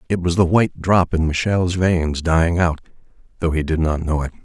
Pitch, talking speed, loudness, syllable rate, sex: 85 Hz, 215 wpm, -19 LUFS, 5.7 syllables/s, male